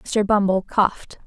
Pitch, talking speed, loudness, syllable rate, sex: 200 Hz, 140 wpm, -20 LUFS, 4.5 syllables/s, female